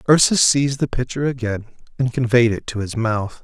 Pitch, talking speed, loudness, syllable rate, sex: 120 Hz, 190 wpm, -19 LUFS, 5.5 syllables/s, male